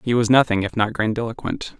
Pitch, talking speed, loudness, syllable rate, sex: 115 Hz, 200 wpm, -20 LUFS, 5.9 syllables/s, male